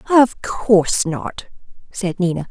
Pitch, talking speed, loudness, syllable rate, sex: 195 Hz, 120 wpm, -18 LUFS, 3.8 syllables/s, female